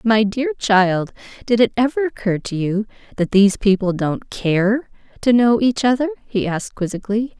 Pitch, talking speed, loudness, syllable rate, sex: 215 Hz, 170 wpm, -18 LUFS, 5.0 syllables/s, female